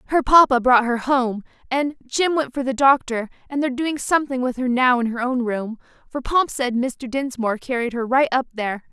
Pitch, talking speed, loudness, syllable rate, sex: 255 Hz, 210 wpm, -20 LUFS, 5.3 syllables/s, female